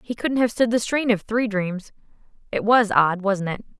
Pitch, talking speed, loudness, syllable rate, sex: 215 Hz, 220 wpm, -21 LUFS, 4.7 syllables/s, female